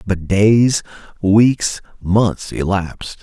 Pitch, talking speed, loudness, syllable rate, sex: 100 Hz, 95 wpm, -16 LUFS, 2.8 syllables/s, male